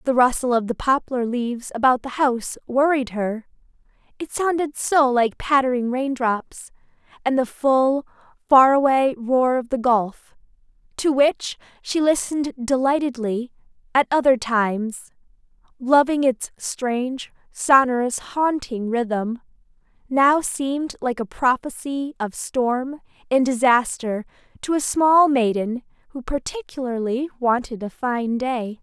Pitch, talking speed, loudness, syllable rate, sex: 255 Hz, 120 wpm, -21 LUFS, 4.1 syllables/s, female